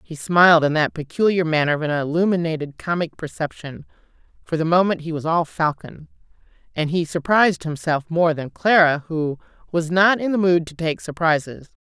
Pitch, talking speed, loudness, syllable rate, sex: 165 Hz, 170 wpm, -20 LUFS, 5.3 syllables/s, female